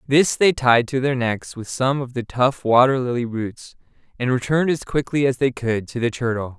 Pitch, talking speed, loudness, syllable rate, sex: 125 Hz, 220 wpm, -20 LUFS, 4.8 syllables/s, male